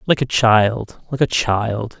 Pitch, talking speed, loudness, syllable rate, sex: 120 Hz, 180 wpm, -17 LUFS, 3.4 syllables/s, male